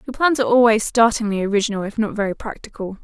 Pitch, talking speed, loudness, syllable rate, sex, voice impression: 220 Hz, 195 wpm, -18 LUFS, 7.0 syllables/s, female, feminine, adult-like, tensed, slightly weak, soft, clear, intellectual, calm, reassuring, kind, modest